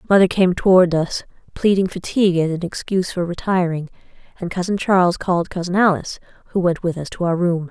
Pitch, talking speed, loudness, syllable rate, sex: 180 Hz, 185 wpm, -19 LUFS, 6.1 syllables/s, female